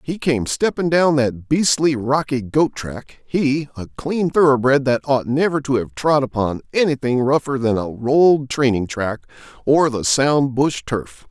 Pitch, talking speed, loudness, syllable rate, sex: 135 Hz, 170 wpm, -18 LUFS, 4.2 syllables/s, male